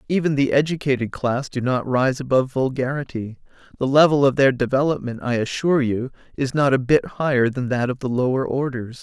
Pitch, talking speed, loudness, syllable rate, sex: 130 Hz, 185 wpm, -20 LUFS, 5.6 syllables/s, male